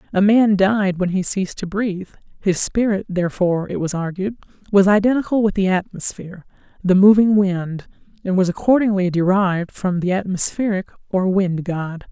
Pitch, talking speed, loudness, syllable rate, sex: 190 Hz, 150 wpm, -18 LUFS, 5.3 syllables/s, female